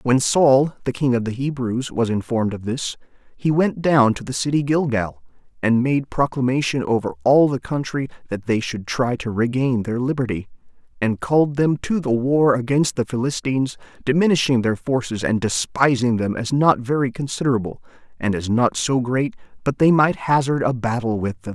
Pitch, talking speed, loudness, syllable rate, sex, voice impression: 125 Hz, 180 wpm, -20 LUFS, 5.1 syllables/s, male, very masculine, middle-aged, very thick, tensed, slightly powerful, slightly bright, slightly soft, slightly muffled, fluent, slightly raspy, cool, very intellectual, refreshing, sincere, very calm, very mature, friendly, reassuring, unique, elegant, wild, slightly sweet, lively, kind, slightly modest